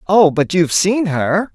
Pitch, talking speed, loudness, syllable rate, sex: 180 Hz, 195 wpm, -15 LUFS, 4.4 syllables/s, male